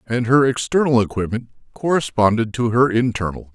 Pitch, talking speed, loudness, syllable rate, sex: 120 Hz, 135 wpm, -18 LUFS, 5.3 syllables/s, male